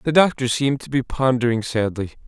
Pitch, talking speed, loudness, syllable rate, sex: 125 Hz, 185 wpm, -21 LUFS, 5.9 syllables/s, male